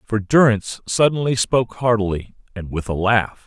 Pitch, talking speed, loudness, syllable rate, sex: 110 Hz, 155 wpm, -19 LUFS, 5.2 syllables/s, male